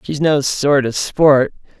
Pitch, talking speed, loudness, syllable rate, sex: 140 Hz, 165 wpm, -15 LUFS, 3.4 syllables/s, male